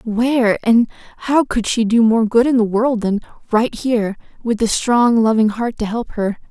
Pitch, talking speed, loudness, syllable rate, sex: 230 Hz, 205 wpm, -16 LUFS, 4.7 syllables/s, female